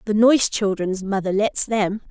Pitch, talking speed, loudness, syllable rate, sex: 205 Hz, 170 wpm, -20 LUFS, 4.7 syllables/s, female